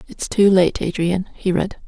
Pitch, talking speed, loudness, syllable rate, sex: 185 Hz, 195 wpm, -18 LUFS, 4.3 syllables/s, female